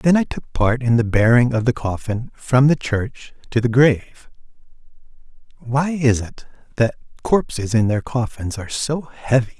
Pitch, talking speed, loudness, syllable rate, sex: 120 Hz, 170 wpm, -19 LUFS, 4.7 syllables/s, male